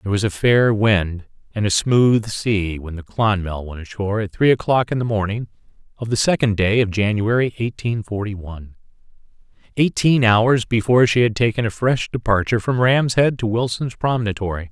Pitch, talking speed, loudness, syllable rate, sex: 110 Hz, 180 wpm, -19 LUFS, 5.2 syllables/s, male